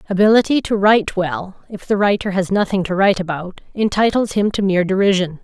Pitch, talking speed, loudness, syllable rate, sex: 195 Hz, 190 wpm, -17 LUFS, 6.0 syllables/s, female